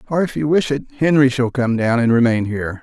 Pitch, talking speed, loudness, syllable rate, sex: 135 Hz, 255 wpm, -17 LUFS, 6.1 syllables/s, male